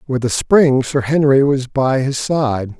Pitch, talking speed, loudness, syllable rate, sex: 135 Hz, 195 wpm, -15 LUFS, 3.8 syllables/s, male